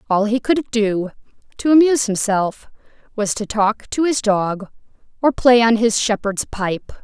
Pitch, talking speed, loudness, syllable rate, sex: 225 Hz, 160 wpm, -18 LUFS, 4.3 syllables/s, female